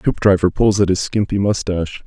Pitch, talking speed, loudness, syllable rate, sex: 95 Hz, 175 wpm, -17 LUFS, 5.4 syllables/s, male